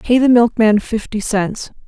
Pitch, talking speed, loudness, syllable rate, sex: 225 Hz, 160 wpm, -15 LUFS, 4.2 syllables/s, female